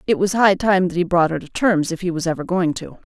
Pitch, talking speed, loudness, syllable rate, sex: 175 Hz, 310 wpm, -19 LUFS, 6.0 syllables/s, female